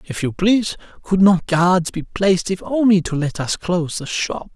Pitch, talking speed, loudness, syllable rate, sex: 180 Hz, 210 wpm, -18 LUFS, 4.8 syllables/s, male